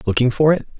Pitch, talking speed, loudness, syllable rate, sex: 135 Hz, 225 wpm, -17 LUFS, 6.9 syllables/s, male